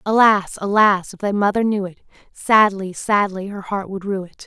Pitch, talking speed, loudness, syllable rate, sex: 200 Hz, 190 wpm, -18 LUFS, 4.8 syllables/s, female